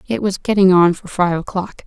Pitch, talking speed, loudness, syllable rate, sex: 185 Hz, 225 wpm, -16 LUFS, 5.3 syllables/s, female